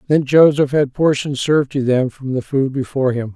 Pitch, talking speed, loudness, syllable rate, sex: 135 Hz, 215 wpm, -16 LUFS, 5.4 syllables/s, male